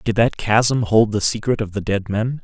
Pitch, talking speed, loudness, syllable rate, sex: 110 Hz, 245 wpm, -18 LUFS, 4.7 syllables/s, male